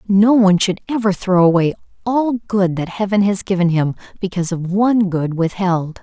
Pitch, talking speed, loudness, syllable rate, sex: 190 Hz, 180 wpm, -17 LUFS, 5.2 syllables/s, female